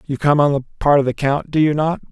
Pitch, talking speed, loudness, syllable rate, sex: 145 Hz, 310 wpm, -17 LUFS, 6.2 syllables/s, male